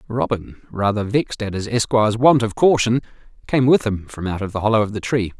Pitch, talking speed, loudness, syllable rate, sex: 110 Hz, 220 wpm, -19 LUFS, 5.7 syllables/s, male